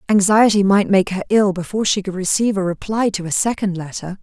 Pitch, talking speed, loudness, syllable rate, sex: 195 Hz, 215 wpm, -17 LUFS, 6.1 syllables/s, female